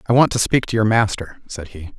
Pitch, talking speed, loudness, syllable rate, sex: 105 Hz, 270 wpm, -17 LUFS, 5.9 syllables/s, male